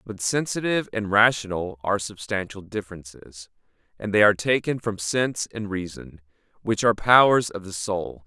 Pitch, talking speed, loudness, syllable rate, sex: 100 Hz, 150 wpm, -23 LUFS, 5.3 syllables/s, male